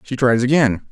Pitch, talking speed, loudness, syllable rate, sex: 125 Hz, 195 wpm, -16 LUFS, 5.1 syllables/s, male